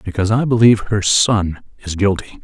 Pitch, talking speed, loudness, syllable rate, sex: 105 Hz, 170 wpm, -15 LUFS, 5.9 syllables/s, male